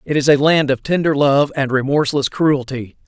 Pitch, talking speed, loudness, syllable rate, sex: 140 Hz, 195 wpm, -16 LUFS, 5.2 syllables/s, male